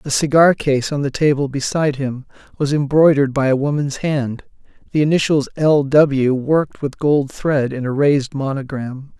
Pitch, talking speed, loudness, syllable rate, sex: 140 Hz, 170 wpm, -17 LUFS, 4.9 syllables/s, male